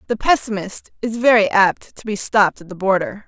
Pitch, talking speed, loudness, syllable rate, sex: 210 Hz, 200 wpm, -18 LUFS, 5.4 syllables/s, female